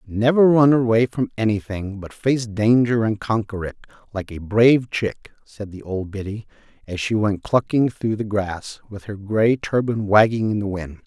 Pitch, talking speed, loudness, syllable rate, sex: 110 Hz, 185 wpm, -20 LUFS, 4.6 syllables/s, male